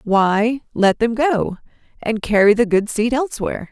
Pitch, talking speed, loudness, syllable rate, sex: 225 Hz, 160 wpm, -18 LUFS, 4.6 syllables/s, female